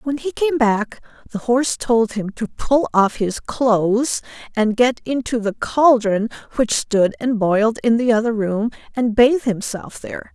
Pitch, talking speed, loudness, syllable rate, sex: 230 Hz, 175 wpm, -18 LUFS, 4.3 syllables/s, female